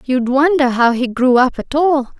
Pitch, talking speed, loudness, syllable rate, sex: 265 Hz, 220 wpm, -14 LUFS, 4.4 syllables/s, female